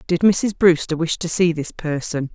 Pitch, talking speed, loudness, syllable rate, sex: 165 Hz, 205 wpm, -19 LUFS, 4.5 syllables/s, female